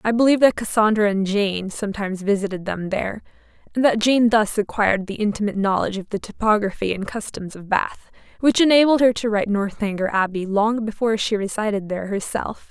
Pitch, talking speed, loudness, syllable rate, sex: 210 Hz, 180 wpm, -20 LUFS, 6.0 syllables/s, female